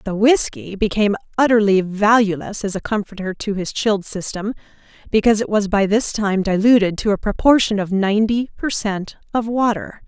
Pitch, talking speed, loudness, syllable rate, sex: 210 Hz, 165 wpm, -18 LUFS, 5.3 syllables/s, female